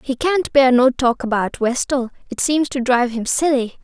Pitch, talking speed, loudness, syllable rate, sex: 260 Hz, 190 wpm, -17 LUFS, 4.8 syllables/s, female